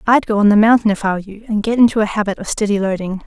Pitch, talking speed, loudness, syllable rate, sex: 210 Hz, 315 wpm, -15 LUFS, 7.5 syllables/s, female